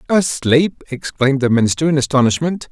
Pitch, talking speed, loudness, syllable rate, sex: 140 Hz, 130 wpm, -16 LUFS, 5.7 syllables/s, male